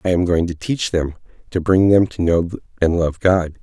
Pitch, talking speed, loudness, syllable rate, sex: 90 Hz, 230 wpm, -18 LUFS, 4.9 syllables/s, male